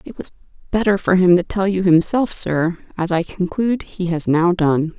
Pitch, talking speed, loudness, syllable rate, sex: 180 Hz, 205 wpm, -18 LUFS, 4.9 syllables/s, female